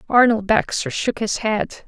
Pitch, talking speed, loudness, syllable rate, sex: 225 Hz, 160 wpm, -19 LUFS, 4.1 syllables/s, female